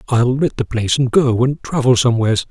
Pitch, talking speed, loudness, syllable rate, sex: 120 Hz, 215 wpm, -16 LUFS, 6.0 syllables/s, male